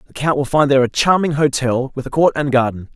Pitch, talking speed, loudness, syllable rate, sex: 135 Hz, 265 wpm, -16 LUFS, 6.3 syllables/s, male